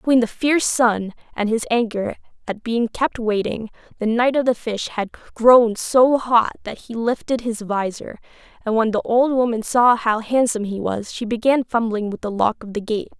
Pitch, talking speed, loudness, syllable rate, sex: 230 Hz, 200 wpm, -20 LUFS, 4.8 syllables/s, female